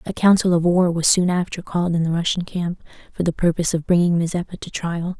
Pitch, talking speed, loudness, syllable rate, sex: 175 Hz, 230 wpm, -20 LUFS, 6.1 syllables/s, female